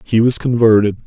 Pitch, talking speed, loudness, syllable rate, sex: 115 Hz, 170 wpm, -13 LUFS, 5.6 syllables/s, male